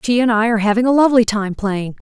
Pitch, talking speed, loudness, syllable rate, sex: 225 Hz, 260 wpm, -16 LUFS, 6.8 syllables/s, female